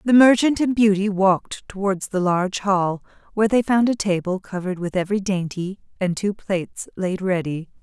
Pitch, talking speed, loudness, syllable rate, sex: 195 Hz, 175 wpm, -21 LUFS, 5.3 syllables/s, female